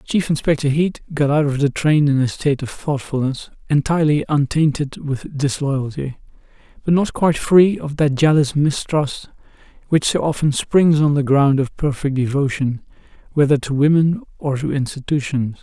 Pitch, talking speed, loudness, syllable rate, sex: 145 Hz, 155 wpm, -18 LUFS, 4.9 syllables/s, male